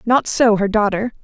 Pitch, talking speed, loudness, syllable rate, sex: 220 Hz, 195 wpm, -16 LUFS, 4.8 syllables/s, female